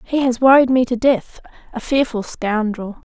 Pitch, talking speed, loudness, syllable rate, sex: 240 Hz, 155 wpm, -17 LUFS, 4.6 syllables/s, female